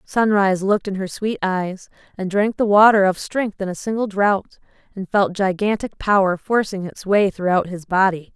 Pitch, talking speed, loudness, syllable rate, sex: 195 Hz, 185 wpm, -19 LUFS, 4.9 syllables/s, female